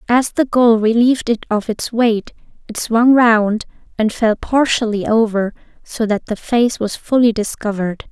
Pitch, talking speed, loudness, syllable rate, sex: 225 Hz, 165 wpm, -16 LUFS, 4.4 syllables/s, female